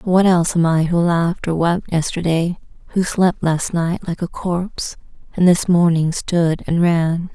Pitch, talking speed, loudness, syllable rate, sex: 170 Hz, 180 wpm, -18 LUFS, 4.3 syllables/s, female